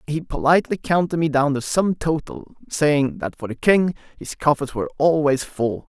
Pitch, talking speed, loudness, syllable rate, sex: 150 Hz, 180 wpm, -21 LUFS, 5.0 syllables/s, male